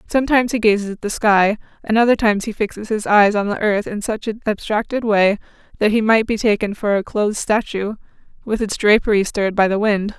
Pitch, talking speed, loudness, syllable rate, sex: 210 Hz, 220 wpm, -18 LUFS, 6.0 syllables/s, female